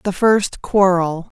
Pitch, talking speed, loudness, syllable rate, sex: 185 Hz, 130 wpm, -17 LUFS, 3.3 syllables/s, female